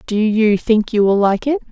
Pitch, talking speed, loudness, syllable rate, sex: 220 Hz, 245 wpm, -15 LUFS, 4.7 syllables/s, female